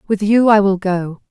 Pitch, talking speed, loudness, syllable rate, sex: 200 Hz, 230 wpm, -14 LUFS, 4.6 syllables/s, female